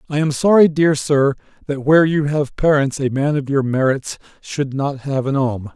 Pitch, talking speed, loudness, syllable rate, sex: 140 Hz, 210 wpm, -17 LUFS, 4.8 syllables/s, male